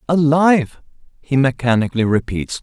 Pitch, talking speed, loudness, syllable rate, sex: 135 Hz, 90 wpm, -16 LUFS, 5.3 syllables/s, male